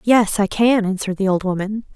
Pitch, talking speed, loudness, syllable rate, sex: 205 Hz, 215 wpm, -18 LUFS, 5.6 syllables/s, female